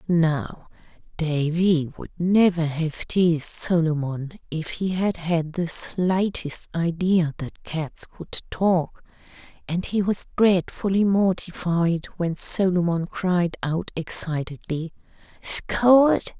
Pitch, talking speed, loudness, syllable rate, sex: 175 Hz, 105 wpm, -23 LUFS, 3.3 syllables/s, female